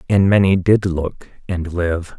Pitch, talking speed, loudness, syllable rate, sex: 90 Hz, 165 wpm, -17 LUFS, 3.8 syllables/s, male